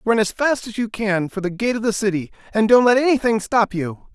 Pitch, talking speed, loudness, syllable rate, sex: 215 Hz, 260 wpm, -19 LUFS, 5.5 syllables/s, male